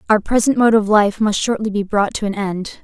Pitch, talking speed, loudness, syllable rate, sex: 210 Hz, 255 wpm, -16 LUFS, 5.3 syllables/s, female